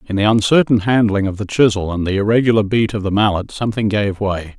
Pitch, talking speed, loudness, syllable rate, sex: 105 Hz, 225 wpm, -16 LUFS, 6.1 syllables/s, male